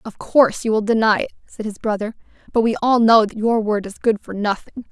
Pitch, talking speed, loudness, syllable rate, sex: 220 Hz, 245 wpm, -18 LUFS, 5.7 syllables/s, female